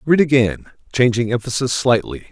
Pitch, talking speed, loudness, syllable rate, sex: 120 Hz, 130 wpm, -17 LUFS, 5.4 syllables/s, male